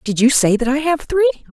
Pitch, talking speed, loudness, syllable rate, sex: 270 Hz, 270 wpm, -16 LUFS, 5.7 syllables/s, female